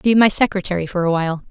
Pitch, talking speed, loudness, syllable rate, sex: 185 Hz, 240 wpm, -18 LUFS, 7.0 syllables/s, female